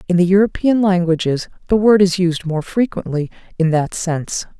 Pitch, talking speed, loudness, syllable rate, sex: 180 Hz, 170 wpm, -17 LUFS, 5.2 syllables/s, female